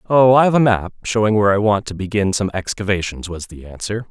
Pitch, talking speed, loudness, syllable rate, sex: 105 Hz, 235 wpm, -17 LUFS, 6.1 syllables/s, male